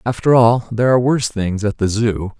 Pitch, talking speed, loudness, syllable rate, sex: 115 Hz, 225 wpm, -16 LUFS, 5.8 syllables/s, male